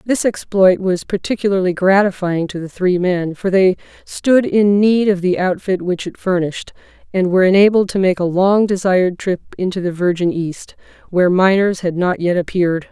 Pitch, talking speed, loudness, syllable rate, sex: 185 Hz, 180 wpm, -16 LUFS, 5.2 syllables/s, female